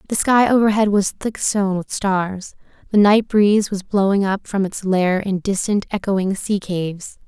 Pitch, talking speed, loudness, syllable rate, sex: 200 Hz, 180 wpm, -18 LUFS, 4.4 syllables/s, female